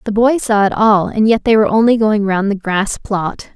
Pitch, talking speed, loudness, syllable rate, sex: 210 Hz, 255 wpm, -14 LUFS, 5.0 syllables/s, female